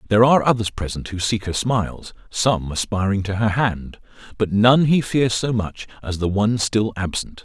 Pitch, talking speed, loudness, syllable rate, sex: 105 Hz, 175 wpm, -20 LUFS, 5.1 syllables/s, male